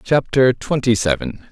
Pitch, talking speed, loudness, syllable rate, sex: 125 Hz, 120 wpm, -17 LUFS, 4.3 syllables/s, male